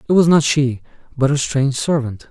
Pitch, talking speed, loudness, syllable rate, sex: 140 Hz, 210 wpm, -17 LUFS, 5.6 syllables/s, male